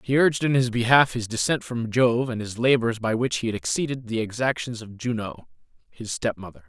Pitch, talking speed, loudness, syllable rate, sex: 120 Hz, 205 wpm, -24 LUFS, 5.6 syllables/s, male